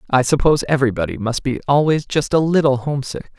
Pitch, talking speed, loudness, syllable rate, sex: 140 Hz, 175 wpm, -18 LUFS, 6.5 syllables/s, male